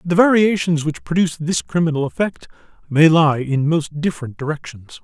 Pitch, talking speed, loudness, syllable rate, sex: 160 Hz, 155 wpm, -18 LUFS, 5.3 syllables/s, male